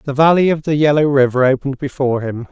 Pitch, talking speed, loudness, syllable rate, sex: 140 Hz, 215 wpm, -15 LUFS, 6.8 syllables/s, male